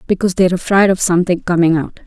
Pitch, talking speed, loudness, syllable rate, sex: 180 Hz, 205 wpm, -14 LUFS, 7.7 syllables/s, female